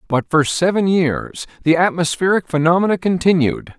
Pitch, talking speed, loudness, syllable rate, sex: 170 Hz, 125 wpm, -17 LUFS, 5.0 syllables/s, male